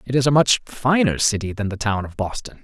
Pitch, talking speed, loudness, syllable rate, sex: 115 Hz, 250 wpm, -20 LUFS, 5.6 syllables/s, male